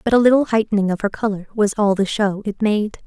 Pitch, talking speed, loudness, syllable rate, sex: 210 Hz, 255 wpm, -18 LUFS, 6.1 syllables/s, female